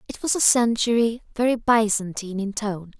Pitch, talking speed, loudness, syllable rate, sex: 220 Hz, 160 wpm, -22 LUFS, 5.3 syllables/s, female